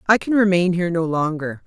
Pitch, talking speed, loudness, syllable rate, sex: 180 Hz, 215 wpm, -19 LUFS, 6.1 syllables/s, female